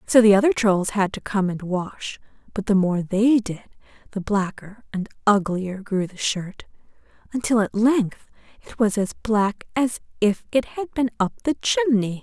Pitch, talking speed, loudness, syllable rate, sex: 210 Hz, 175 wpm, -22 LUFS, 4.3 syllables/s, female